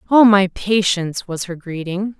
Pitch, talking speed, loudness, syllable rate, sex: 190 Hz, 165 wpm, -17 LUFS, 4.6 syllables/s, female